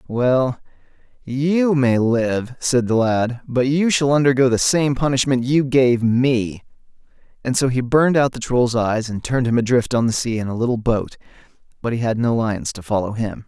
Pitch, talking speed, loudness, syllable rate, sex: 125 Hz, 195 wpm, -19 LUFS, 4.8 syllables/s, male